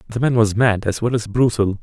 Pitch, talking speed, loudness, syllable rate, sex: 110 Hz, 265 wpm, -18 LUFS, 5.4 syllables/s, male